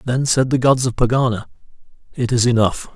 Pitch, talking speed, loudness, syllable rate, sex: 120 Hz, 185 wpm, -17 LUFS, 5.6 syllables/s, male